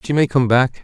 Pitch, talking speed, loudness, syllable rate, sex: 130 Hz, 290 wpm, -16 LUFS, 5.5 syllables/s, male